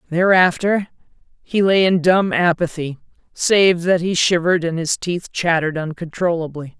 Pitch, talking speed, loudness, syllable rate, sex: 175 Hz, 130 wpm, -17 LUFS, 4.7 syllables/s, female